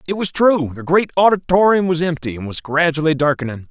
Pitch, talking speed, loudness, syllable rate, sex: 160 Hz, 195 wpm, -17 LUFS, 5.8 syllables/s, male